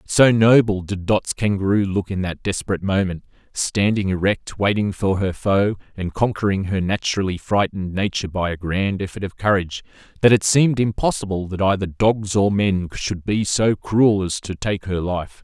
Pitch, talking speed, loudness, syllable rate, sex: 100 Hz, 180 wpm, -20 LUFS, 5.1 syllables/s, male